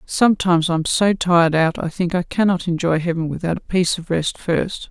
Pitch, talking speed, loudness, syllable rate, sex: 175 Hz, 210 wpm, -19 LUFS, 5.4 syllables/s, female